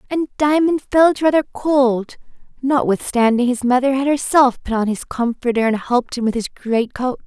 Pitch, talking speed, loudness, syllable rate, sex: 255 Hz, 165 wpm, -17 LUFS, 4.8 syllables/s, female